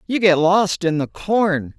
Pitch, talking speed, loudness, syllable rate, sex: 180 Hz, 200 wpm, -18 LUFS, 3.7 syllables/s, female